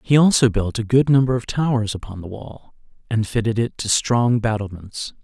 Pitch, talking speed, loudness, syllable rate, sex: 115 Hz, 195 wpm, -19 LUFS, 5.1 syllables/s, male